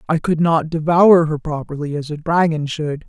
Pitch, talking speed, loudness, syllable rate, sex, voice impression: 160 Hz, 195 wpm, -17 LUFS, 4.8 syllables/s, female, slightly masculine, adult-like, slightly powerful, intellectual, slightly calm